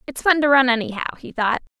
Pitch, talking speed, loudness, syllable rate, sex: 260 Hz, 235 wpm, -19 LUFS, 6.6 syllables/s, female